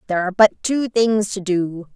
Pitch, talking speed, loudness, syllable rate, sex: 200 Hz, 215 wpm, -19 LUFS, 5.2 syllables/s, female